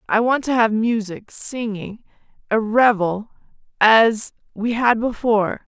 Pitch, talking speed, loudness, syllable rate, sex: 225 Hz, 125 wpm, -19 LUFS, 3.9 syllables/s, female